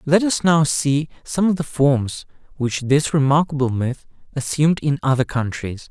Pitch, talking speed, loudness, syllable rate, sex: 145 Hz, 165 wpm, -19 LUFS, 4.6 syllables/s, male